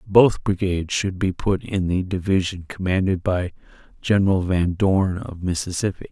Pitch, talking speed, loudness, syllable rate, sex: 95 Hz, 145 wpm, -22 LUFS, 4.7 syllables/s, male